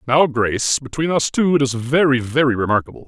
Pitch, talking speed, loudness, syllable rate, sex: 130 Hz, 195 wpm, -18 LUFS, 5.8 syllables/s, male